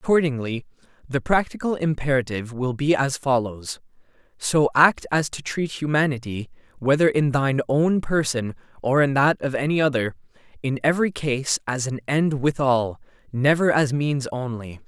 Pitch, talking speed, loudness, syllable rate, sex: 140 Hz, 145 wpm, -22 LUFS, 4.9 syllables/s, male